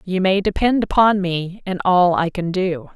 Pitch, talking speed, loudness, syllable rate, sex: 185 Hz, 205 wpm, -18 LUFS, 4.3 syllables/s, female